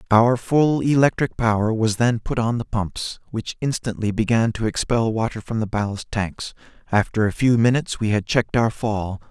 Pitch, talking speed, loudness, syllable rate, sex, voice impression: 115 Hz, 185 wpm, -21 LUFS, 5.0 syllables/s, male, masculine, adult-like, slightly thick, cool, slightly refreshing, sincere, friendly